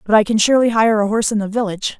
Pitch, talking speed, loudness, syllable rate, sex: 215 Hz, 300 wpm, -16 LUFS, 8.0 syllables/s, female